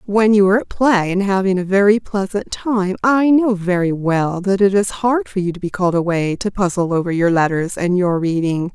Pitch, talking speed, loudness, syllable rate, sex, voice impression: 190 Hz, 225 wpm, -17 LUFS, 5.2 syllables/s, female, feminine, gender-neutral, adult-like, slightly middle-aged, very thin, slightly tensed, slightly weak, very bright, slightly soft, clear, fluent, slightly cute, intellectual, very refreshing, sincere, very calm, friendly, reassuring, unique, elegant, sweet, lively, very kind